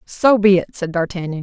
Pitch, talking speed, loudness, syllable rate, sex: 185 Hz, 210 wpm, -17 LUFS, 5.1 syllables/s, female